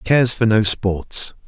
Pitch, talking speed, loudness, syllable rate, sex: 110 Hz, 165 wpm, -18 LUFS, 4.0 syllables/s, male